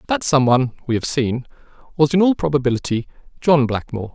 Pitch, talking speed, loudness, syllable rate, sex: 140 Hz, 175 wpm, -19 LUFS, 6.3 syllables/s, male